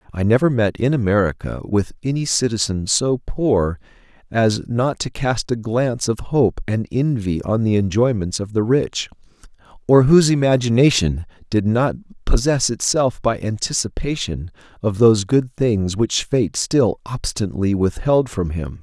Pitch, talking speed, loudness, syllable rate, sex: 115 Hz, 145 wpm, -19 LUFS, 4.6 syllables/s, male